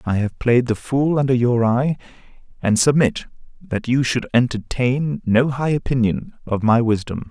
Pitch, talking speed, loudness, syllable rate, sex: 125 Hz, 165 wpm, -19 LUFS, 4.5 syllables/s, male